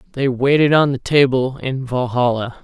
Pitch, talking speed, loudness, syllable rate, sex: 130 Hz, 160 wpm, -17 LUFS, 4.8 syllables/s, male